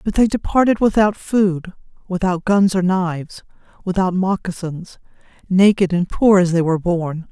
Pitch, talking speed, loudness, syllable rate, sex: 185 Hz, 150 wpm, -17 LUFS, 4.7 syllables/s, female